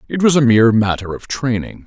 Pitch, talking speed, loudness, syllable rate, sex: 120 Hz, 225 wpm, -15 LUFS, 5.9 syllables/s, male